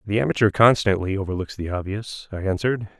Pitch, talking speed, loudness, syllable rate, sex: 100 Hz, 160 wpm, -22 LUFS, 6.1 syllables/s, male